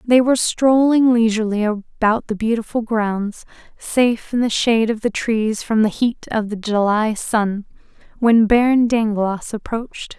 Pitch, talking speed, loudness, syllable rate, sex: 225 Hz, 155 wpm, -18 LUFS, 4.5 syllables/s, female